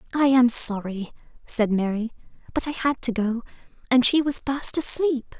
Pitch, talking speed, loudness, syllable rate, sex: 245 Hz, 165 wpm, -21 LUFS, 4.7 syllables/s, female